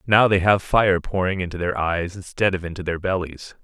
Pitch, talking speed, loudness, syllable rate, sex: 90 Hz, 215 wpm, -21 LUFS, 5.2 syllables/s, male